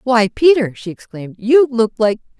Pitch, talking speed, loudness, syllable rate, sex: 225 Hz, 175 wpm, -15 LUFS, 5.5 syllables/s, female